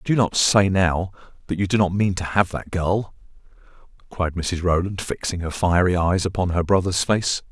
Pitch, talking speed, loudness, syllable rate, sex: 90 Hz, 200 wpm, -21 LUFS, 5.0 syllables/s, male